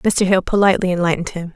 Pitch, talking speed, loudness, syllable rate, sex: 185 Hz, 195 wpm, -17 LUFS, 7.3 syllables/s, female